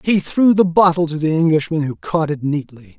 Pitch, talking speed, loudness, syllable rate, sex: 160 Hz, 220 wpm, -17 LUFS, 5.2 syllables/s, male